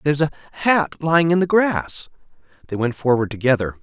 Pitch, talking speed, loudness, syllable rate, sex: 145 Hz, 190 wpm, -19 LUFS, 6.0 syllables/s, male